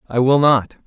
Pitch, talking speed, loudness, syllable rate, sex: 130 Hz, 210 wpm, -15 LUFS, 4.9 syllables/s, male